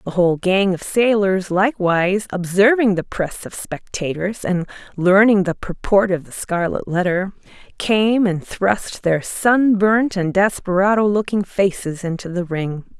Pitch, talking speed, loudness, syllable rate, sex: 190 Hz, 145 wpm, -18 LUFS, 4.3 syllables/s, female